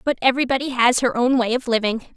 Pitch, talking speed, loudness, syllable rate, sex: 245 Hz, 220 wpm, -19 LUFS, 6.6 syllables/s, female